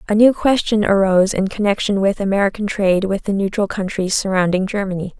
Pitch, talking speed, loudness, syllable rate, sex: 200 Hz, 175 wpm, -17 LUFS, 6.0 syllables/s, female